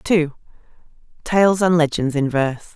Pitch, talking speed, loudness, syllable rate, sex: 160 Hz, 130 wpm, -18 LUFS, 5.6 syllables/s, female